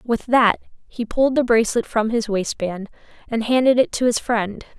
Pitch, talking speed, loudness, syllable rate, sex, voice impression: 230 Hz, 190 wpm, -20 LUFS, 5.1 syllables/s, female, feminine, adult-like, tensed, powerful, bright, clear, fluent, intellectual, friendly, reassuring, unique, lively, slightly kind